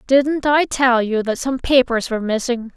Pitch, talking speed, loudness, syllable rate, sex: 250 Hz, 195 wpm, -18 LUFS, 4.6 syllables/s, female